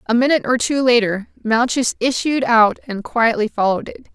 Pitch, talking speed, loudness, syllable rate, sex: 235 Hz, 175 wpm, -17 LUFS, 5.3 syllables/s, female